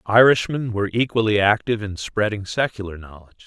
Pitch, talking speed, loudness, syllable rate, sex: 105 Hz, 140 wpm, -20 LUFS, 6.0 syllables/s, male